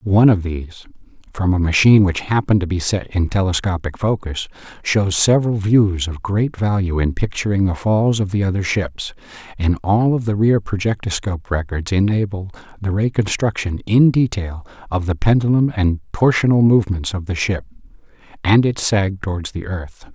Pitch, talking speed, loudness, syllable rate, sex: 100 Hz, 165 wpm, -18 LUFS, 5.1 syllables/s, male